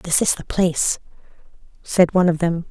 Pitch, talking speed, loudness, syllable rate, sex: 170 Hz, 175 wpm, -19 LUFS, 5.5 syllables/s, female